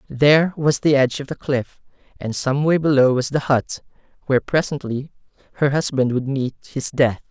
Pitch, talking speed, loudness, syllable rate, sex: 140 Hz, 180 wpm, -19 LUFS, 5.1 syllables/s, male